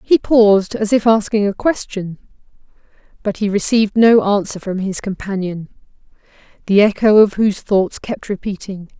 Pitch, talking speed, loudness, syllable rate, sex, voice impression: 205 Hz, 145 wpm, -16 LUFS, 4.9 syllables/s, female, feminine, middle-aged, tensed, powerful, slightly hard, slightly halting, intellectual, friendly, lively, intense, slightly sharp